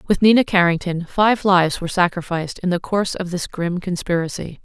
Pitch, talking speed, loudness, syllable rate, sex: 180 Hz, 180 wpm, -19 LUFS, 5.8 syllables/s, female